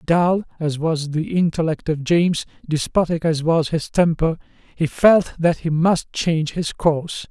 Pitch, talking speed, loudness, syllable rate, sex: 165 Hz, 165 wpm, -20 LUFS, 4.3 syllables/s, male